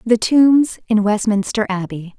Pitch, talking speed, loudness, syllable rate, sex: 215 Hz, 135 wpm, -16 LUFS, 4.0 syllables/s, female